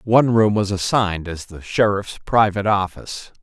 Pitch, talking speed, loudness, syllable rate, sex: 100 Hz, 160 wpm, -19 LUFS, 5.4 syllables/s, male